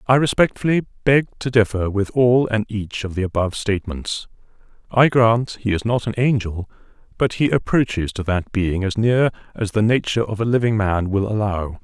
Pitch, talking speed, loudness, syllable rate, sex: 110 Hz, 190 wpm, -19 LUFS, 5.1 syllables/s, male